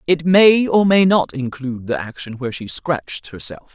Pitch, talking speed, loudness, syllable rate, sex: 150 Hz, 190 wpm, -17 LUFS, 5.0 syllables/s, female